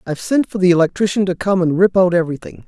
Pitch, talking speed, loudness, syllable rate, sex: 180 Hz, 245 wpm, -16 LUFS, 7.1 syllables/s, male